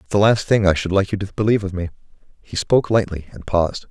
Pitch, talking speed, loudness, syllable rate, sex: 100 Hz, 260 wpm, -19 LUFS, 6.8 syllables/s, male